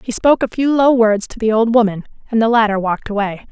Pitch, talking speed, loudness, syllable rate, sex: 225 Hz, 255 wpm, -15 LUFS, 6.4 syllables/s, female